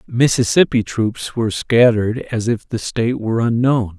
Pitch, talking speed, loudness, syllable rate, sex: 115 Hz, 150 wpm, -17 LUFS, 4.9 syllables/s, male